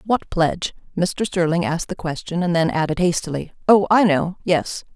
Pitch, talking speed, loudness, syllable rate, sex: 175 Hz, 180 wpm, -20 LUFS, 5.2 syllables/s, female